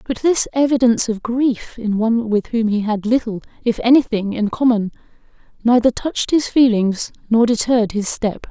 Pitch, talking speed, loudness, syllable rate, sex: 230 Hz, 170 wpm, -17 LUFS, 5.1 syllables/s, female